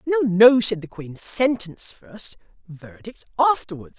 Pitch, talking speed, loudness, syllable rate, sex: 210 Hz, 120 wpm, -19 LUFS, 4.1 syllables/s, male